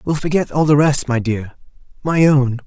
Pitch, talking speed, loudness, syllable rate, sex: 140 Hz, 155 wpm, -16 LUFS, 4.9 syllables/s, male